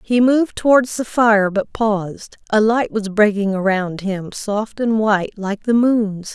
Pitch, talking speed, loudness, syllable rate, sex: 215 Hz, 180 wpm, -17 LUFS, 4.1 syllables/s, female